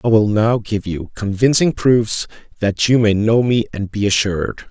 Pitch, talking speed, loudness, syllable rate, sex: 110 Hz, 190 wpm, -17 LUFS, 4.6 syllables/s, male